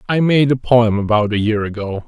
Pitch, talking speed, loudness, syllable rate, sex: 115 Hz, 230 wpm, -16 LUFS, 5.3 syllables/s, male